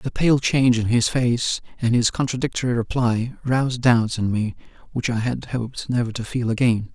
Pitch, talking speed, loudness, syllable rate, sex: 120 Hz, 190 wpm, -21 LUFS, 5.1 syllables/s, male